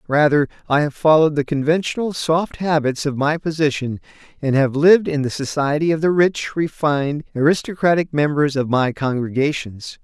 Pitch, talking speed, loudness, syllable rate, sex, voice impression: 150 Hz, 155 wpm, -18 LUFS, 5.2 syllables/s, male, very masculine, very adult-like, middle-aged, thick, very tensed, powerful, very bright, soft, very clear, very fluent, cool, very intellectual, very refreshing, sincere, very calm, very friendly, very reassuring, unique, very elegant, slightly wild, very sweet, very lively, very kind, very light